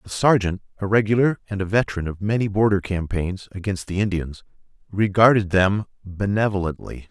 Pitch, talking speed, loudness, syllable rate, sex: 100 Hz, 145 wpm, -21 LUFS, 5.4 syllables/s, male